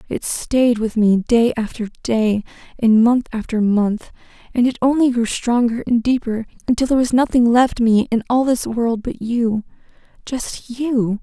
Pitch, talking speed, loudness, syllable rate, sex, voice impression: 235 Hz, 165 wpm, -18 LUFS, 4.4 syllables/s, female, feminine, slightly young, soft, slightly cute, slightly sincere, friendly, slightly kind